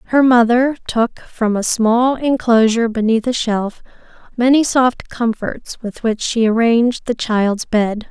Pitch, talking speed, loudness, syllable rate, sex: 230 Hz, 150 wpm, -16 LUFS, 4.0 syllables/s, female